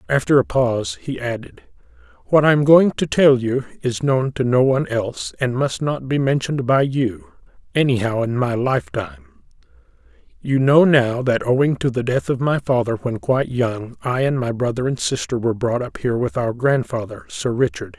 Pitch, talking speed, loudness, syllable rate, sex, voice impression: 130 Hz, 190 wpm, -19 LUFS, 5.2 syllables/s, male, masculine, middle-aged, thick, powerful, slightly weak, muffled, very raspy, mature, slightly friendly, unique, wild, lively, slightly strict, intense